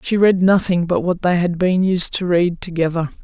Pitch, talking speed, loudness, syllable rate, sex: 180 Hz, 225 wpm, -17 LUFS, 4.9 syllables/s, female